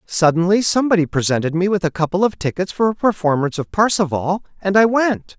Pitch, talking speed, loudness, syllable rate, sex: 185 Hz, 190 wpm, -17 LUFS, 6.1 syllables/s, male